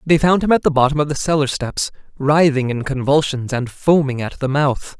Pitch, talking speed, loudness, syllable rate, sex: 145 Hz, 215 wpm, -17 LUFS, 5.2 syllables/s, male